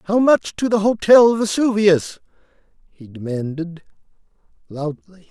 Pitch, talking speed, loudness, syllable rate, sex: 190 Hz, 100 wpm, -17 LUFS, 4.1 syllables/s, male